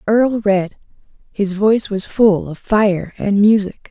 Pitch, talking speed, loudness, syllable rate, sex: 205 Hz, 155 wpm, -16 LUFS, 4.1 syllables/s, female